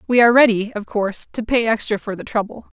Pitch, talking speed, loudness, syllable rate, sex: 220 Hz, 235 wpm, -18 LUFS, 6.3 syllables/s, female